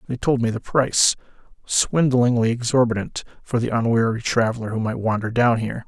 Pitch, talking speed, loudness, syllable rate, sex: 120 Hz, 155 wpm, -20 LUFS, 5.6 syllables/s, male